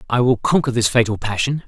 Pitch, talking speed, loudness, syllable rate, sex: 120 Hz, 215 wpm, -18 LUFS, 6.1 syllables/s, male